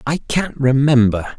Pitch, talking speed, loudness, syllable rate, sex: 135 Hz, 130 wpm, -16 LUFS, 4.3 syllables/s, male